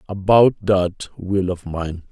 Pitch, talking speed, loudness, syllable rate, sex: 95 Hz, 140 wpm, -19 LUFS, 4.1 syllables/s, male